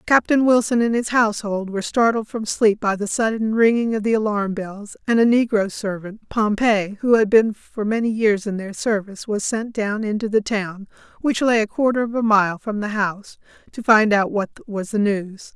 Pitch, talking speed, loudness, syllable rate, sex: 215 Hz, 210 wpm, -20 LUFS, 5.0 syllables/s, female